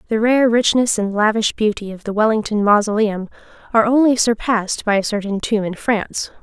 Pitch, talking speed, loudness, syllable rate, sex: 215 Hz, 175 wpm, -17 LUFS, 5.6 syllables/s, female